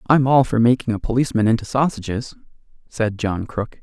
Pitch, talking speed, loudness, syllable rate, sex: 120 Hz, 175 wpm, -19 LUFS, 5.8 syllables/s, male